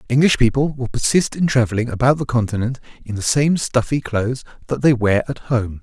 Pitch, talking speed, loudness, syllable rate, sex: 125 Hz, 195 wpm, -18 LUFS, 5.7 syllables/s, male